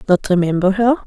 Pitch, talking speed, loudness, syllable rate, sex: 200 Hz, 170 wpm, -16 LUFS, 5.9 syllables/s, female